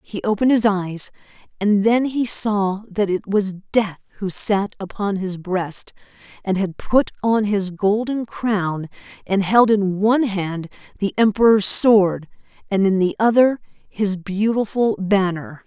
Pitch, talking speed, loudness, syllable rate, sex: 200 Hz, 150 wpm, -19 LUFS, 3.9 syllables/s, female